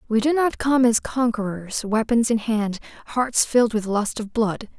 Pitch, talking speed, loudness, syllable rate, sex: 230 Hz, 190 wpm, -21 LUFS, 4.5 syllables/s, female